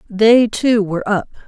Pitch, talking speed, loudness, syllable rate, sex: 215 Hz, 165 wpm, -15 LUFS, 4.6 syllables/s, female